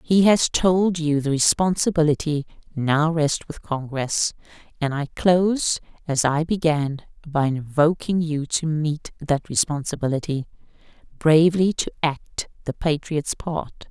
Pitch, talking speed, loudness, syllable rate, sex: 155 Hz, 125 wpm, -22 LUFS, 4.1 syllables/s, female